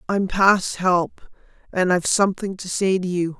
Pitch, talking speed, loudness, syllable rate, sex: 185 Hz, 160 wpm, -20 LUFS, 4.7 syllables/s, female